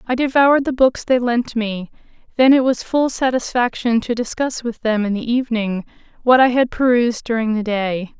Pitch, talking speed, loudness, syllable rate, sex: 240 Hz, 190 wpm, -17 LUFS, 5.2 syllables/s, female